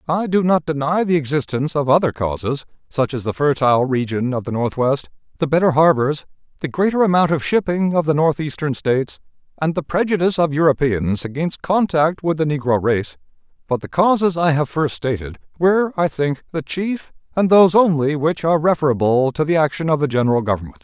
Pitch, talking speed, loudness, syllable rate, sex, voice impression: 150 Hz, 185 wpm, -18 LUFS, 5.7 syllables/s, male, masculine, adult-like, fluent, cool, slightly refreshing, sincere